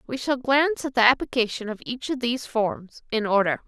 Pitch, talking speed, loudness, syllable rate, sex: 240 Hz, 210 wpm, -23 LUFS, 5.5 syllables/s, female